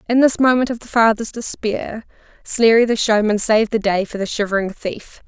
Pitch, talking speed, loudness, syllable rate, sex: 220 Hz, 195 wpm, -17 LUFS, 5.3 syllables/s, female